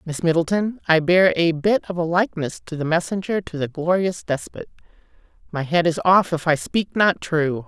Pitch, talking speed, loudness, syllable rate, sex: 170 Hz, 190 wpm, -20 LUFS, 5.0 syllables/s, female